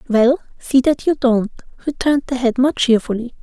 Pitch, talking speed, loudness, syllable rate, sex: 255 Hz, 175 wpm, -17 LUFS, 5.4 syllables/s, female